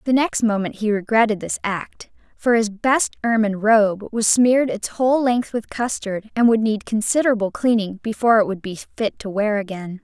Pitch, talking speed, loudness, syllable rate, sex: 220 Hz, 190 wpm, -20 LUFS, 5.2 syllables/s, female